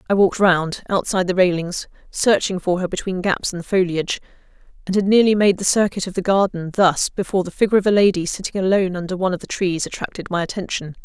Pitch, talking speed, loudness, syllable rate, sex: 185 Hz, 215 wpm, -19 LUFS, 6.7 syllables/s, female